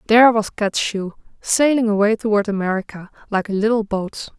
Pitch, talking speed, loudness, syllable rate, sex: 210 Hz, 165 wpm, -19 LUFS, 5.4 syllables/s, female